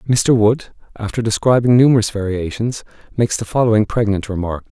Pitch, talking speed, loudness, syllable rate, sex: 110 Hz, 140 wpm, -16 LUFS, 5.6 syllables/s, male